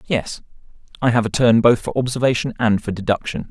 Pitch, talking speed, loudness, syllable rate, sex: 115 Hz, 190 wpm, -18 LUFS, 5.8 syllables/s, male